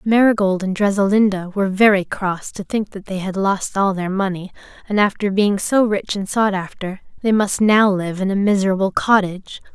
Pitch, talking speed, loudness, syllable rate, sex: 195 Hz, 190 wpm, -18 LUFS, 5.1 syllables/s, female